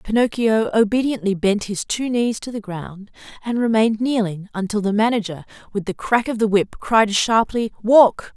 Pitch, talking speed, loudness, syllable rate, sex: 215 Hz, 170 wpm, -19 LUFS, 4.9 syllables/s, female